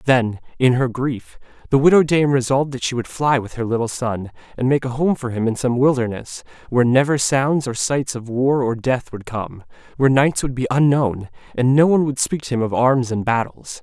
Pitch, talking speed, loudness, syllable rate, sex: 130 Hz, 225 wpm, -19 LUFS, 5.3 syllables/s, male